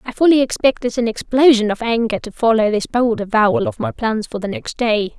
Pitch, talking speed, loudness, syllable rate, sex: 225 Hz, 220 wpm, -17 LUFS, 5.6 syllables/s, female